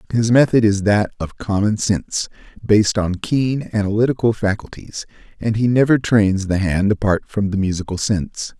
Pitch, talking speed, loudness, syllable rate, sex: 105 Hz, 160 wpm, -18 LUFS, 5.0 syllables/s, male